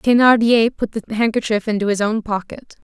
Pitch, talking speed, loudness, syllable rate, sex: 220 Hz, 165 wpm, -17 LUFS, 5.3 syllables/s, female